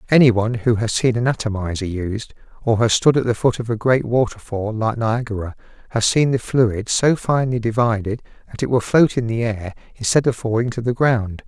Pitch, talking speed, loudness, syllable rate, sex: 115 Hz, 205 wpm, -19 LUFS, 5.4 syllables/s, male